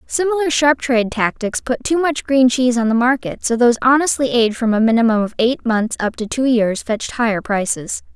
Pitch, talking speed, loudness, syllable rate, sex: 245 Hz, 215 wpm, -17 LUFS, 5.6 syllables/s, female